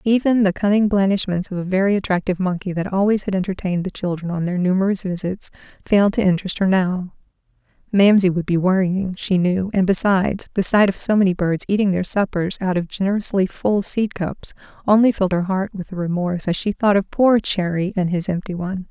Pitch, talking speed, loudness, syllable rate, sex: 190 Hz, 200 wpm, -19 LUFS, 5.8 syllables/s, female